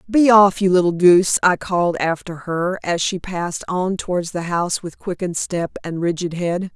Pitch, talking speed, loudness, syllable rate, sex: 180 Hz, 195 wpm, -19 LUFS, 5.0 syllables/s, female